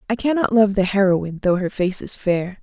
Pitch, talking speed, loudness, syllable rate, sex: 200 Hz, 230 wpm, -19 LUFS, 5.5 syllables/s, female